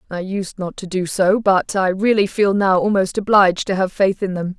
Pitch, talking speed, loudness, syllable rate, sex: 190 Hz, 235 wpm, -18 LUFS, 5.0 syllables/s, female